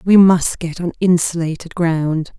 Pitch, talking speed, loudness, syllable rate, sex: 170 Hz, 150 wpm, -16 LUFS, 4.1 syllables/s, female